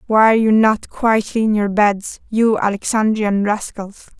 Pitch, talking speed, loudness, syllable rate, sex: 210 Hz, 155 wpm, -16 LUFS, 4.4 syllables/s, female